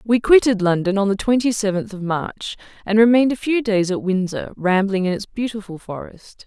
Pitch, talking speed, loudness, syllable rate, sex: 205 Hz, 195 wpm, -19 LUFS, 5.3 syllables/s, female